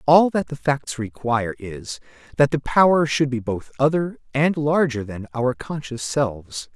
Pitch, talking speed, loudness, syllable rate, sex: 135 Hz, 170 wpm, -21 LUFS, 4.4 syllables/s, male